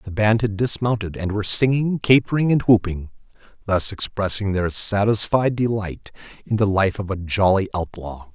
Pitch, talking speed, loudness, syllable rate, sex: 105 Hz, 160 wpm, -20 LUFS, 5.0 syllables/s, male